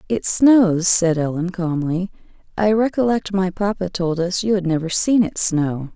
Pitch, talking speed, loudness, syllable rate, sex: 185 Hz, 170 wpm, -18 LUFS, 4.3 syllables/s, female